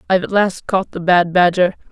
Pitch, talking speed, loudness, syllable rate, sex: 185 Hz, 250 wpm, -16 LUFS, 5.7 syllables/s, female